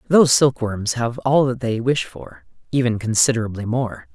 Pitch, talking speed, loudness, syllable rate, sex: 120 Hz, 145 wpm, -19 LUFS, 5.0 syllables/s, male